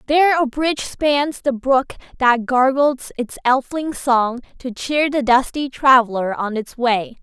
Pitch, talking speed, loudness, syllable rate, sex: 260 Hz, 160 wpm, -18 LUFS, 4.1 syllables/s, female